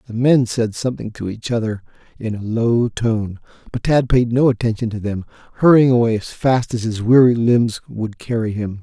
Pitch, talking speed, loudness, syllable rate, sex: 115 Hz, 195 wpm, -18 LUFS, 5.0 syllables/s, male